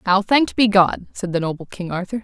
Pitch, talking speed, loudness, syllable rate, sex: 195 Hz, 240 wpm, -19 LUFS, 6.0 syllables/s, female